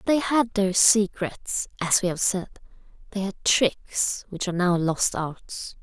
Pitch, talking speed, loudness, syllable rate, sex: 195 Hz, 165 wpm, -24 LUFS, 3.7 syllables/s, female